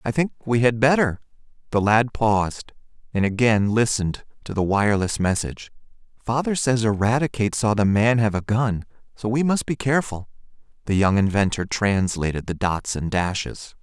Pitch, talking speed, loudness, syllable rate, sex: 110 Hz, 160 wpm, -22 LUFS, 5.3 syllables/s, male